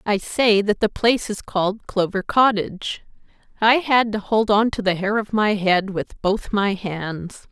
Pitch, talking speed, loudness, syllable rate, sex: 205 Hz, 190 wpm, -20 LUFS, 4.3 syllables/s, female